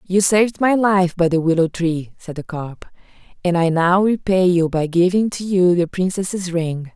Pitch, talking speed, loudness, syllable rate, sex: 180 Hz, 200 wpm, -18 LUFS, 4.5 syllables/s, female